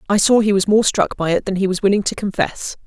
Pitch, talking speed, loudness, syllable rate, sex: 200 Hz, 295 wpm, -17 LUFS, 6.2 syllables/s, female